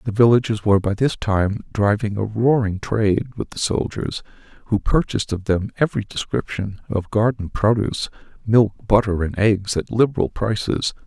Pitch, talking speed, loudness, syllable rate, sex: 105 Hz, 155 wpm, -20 LUFS, 5.0 syllables/s, male